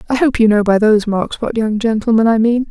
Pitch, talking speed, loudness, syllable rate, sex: 225 Hz, 265 wpm, -14 LUFS, 6.0 syllables/s, female